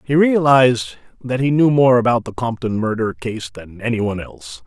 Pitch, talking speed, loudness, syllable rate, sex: 120 Hz, 195 wpm, -17 LUFS, 5.5 syllables/s, male